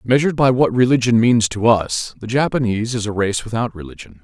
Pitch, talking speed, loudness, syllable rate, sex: 115 Hz, 200 wpm, -17 LUFS, 5.9 syllables/s, male